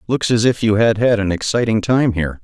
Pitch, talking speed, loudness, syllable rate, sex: 110 Hz, 245 wpm, -16 LUFS, 5.7 syllables/s, male